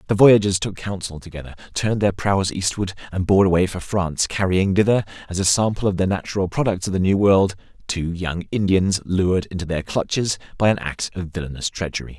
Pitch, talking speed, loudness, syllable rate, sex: 95 Hz, 195 wpm, -21 LUFS, 5.8 syllables/s, male